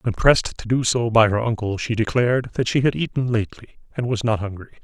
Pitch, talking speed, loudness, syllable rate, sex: 115 Hz, 235 wpm, -21 LUFS, 6.3 syllables/s, male